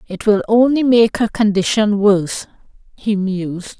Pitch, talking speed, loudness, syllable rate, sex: 205 Hz, 140 wpm, -15 LUFS, 4.5 syllables/s, female